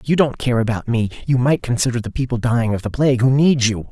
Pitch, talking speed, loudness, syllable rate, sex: 125 Hz, 275 wpm, -18 LUFS, 6.5 syllables/s, male